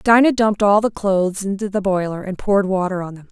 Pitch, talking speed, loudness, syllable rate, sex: 195 Hz, 235 wpm, -18 LUFS, 6.1 syllables/s, female